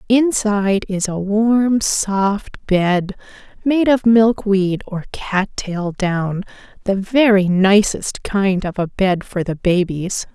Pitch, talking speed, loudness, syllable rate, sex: 200 Hz, 130 wpm, -17 LUFS, 3.2 syllables/s, female